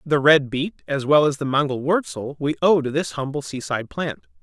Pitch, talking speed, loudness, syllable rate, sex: 145 Hz, 215 wpm, -21 LUFS, 5.3 syllables/s, male